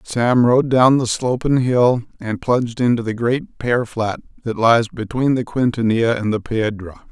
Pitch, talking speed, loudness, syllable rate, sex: 120 Hz, 175 wpm, -18 LUFS, 4.4 syllables/s, male